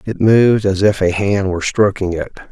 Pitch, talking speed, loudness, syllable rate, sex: 100 Hz, 215 wpm, -15 LUFS, 5.2 syllables/s, male